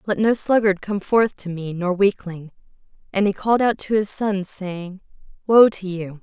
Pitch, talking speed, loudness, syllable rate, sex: 195 Hz, 195 wpm, -20 LUFS, 4.6 syllables/s, female